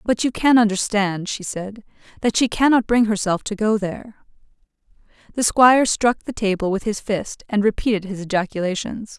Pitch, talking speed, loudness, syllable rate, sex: 210 Hz, 170 wpm, -20 LUFS, 5.1 syllables/s, female